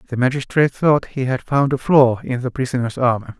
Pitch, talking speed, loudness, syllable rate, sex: 125 Hz, 210 wpm, -18 LUFS, 5.7 syllables/s, male